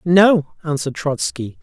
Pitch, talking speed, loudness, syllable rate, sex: 155 Hz, 110 wpm, -18 LUFS, 4.2 syllables/s, male